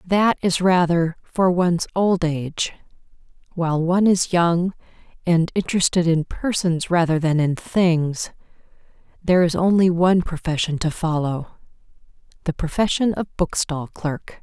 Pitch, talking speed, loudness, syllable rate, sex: 170 Hz, 125 wpm, -20 LUFS, 4.6 syllables/s, female